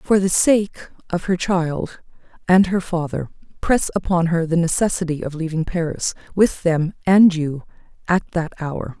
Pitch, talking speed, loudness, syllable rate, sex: 170 Hz, 160 wpm, -19 LUFS, 4.4 syllables/s, female